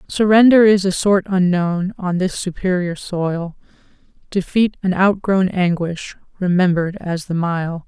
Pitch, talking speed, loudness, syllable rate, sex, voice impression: 185 Hz, 130 wpm, -17 LUFS, 4.2 syllables/s, female, feminine, adult-like, tensed, hard, fluent, intellectual, calm, elegant, kind, modest